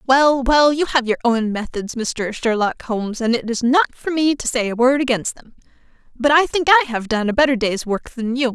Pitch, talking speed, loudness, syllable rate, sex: 250 Hz, 240 wpm, -18 LUFS, 5.1 syllables/s, female